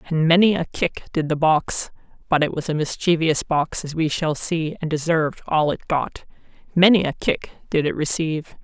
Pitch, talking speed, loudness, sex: 160 Hz, 180 wpm, -21 LUFS, female